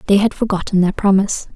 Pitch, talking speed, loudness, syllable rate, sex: 195 Hz, 195 wpm, -16 LUFS, 6.8 syllables/s, female